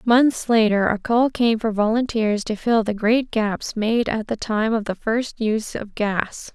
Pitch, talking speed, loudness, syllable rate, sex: 220 Hz, 200 wpm, -21 LUFS, 4.0 syllables/s, female